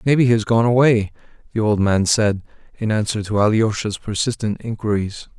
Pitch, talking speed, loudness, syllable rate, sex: 110 Hz, 165 wpm, -19 LUFS, 5.4 syllables/s, male